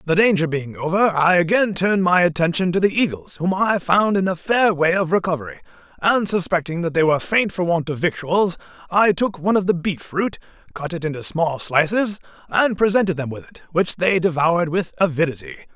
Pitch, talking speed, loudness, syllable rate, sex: 175 Hz, 200 wpm, -19 LUFS, 5.6 syllables/s, male